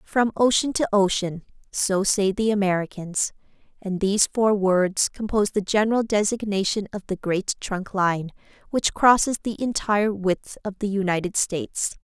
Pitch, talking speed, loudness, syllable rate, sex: 200 Hz, 145 wpm, -23 LUFS, 4.8 syllables/s, female